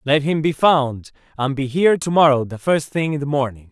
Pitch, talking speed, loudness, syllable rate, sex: 145 Hz, 240 wpm, -18 LUFS, 5.4 syllables/s, male